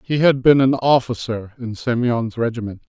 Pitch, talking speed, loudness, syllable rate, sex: 120 Hz, 165 wpm, -18 LUFS, 4.9 syllables/s, male